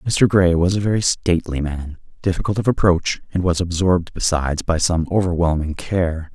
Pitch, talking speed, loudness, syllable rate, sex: 90 Hz, 170 wpm, -19 LUFS, 5.3 syllables/s, male